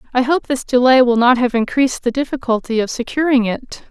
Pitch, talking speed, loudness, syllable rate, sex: 250 Hz, 200 wpm, -16 LUFS, 5.9 syllables/s, female